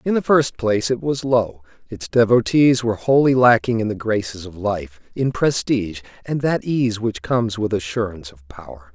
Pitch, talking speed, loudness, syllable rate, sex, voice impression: 110 Hz, 190 wpm, -19 LUFS, 5.1 syllables/s, male, masculine, adult-like, thick, tensed, powerful, hard, raspy, cool, intellectual, calm, mature, slightly friendly, wild, lively, slightly strict, slightly intense